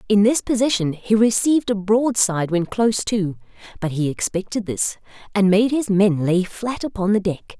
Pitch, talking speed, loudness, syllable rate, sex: 205 Hz, 180 wpm, -20 LUFS, 5.0 syllables/s, female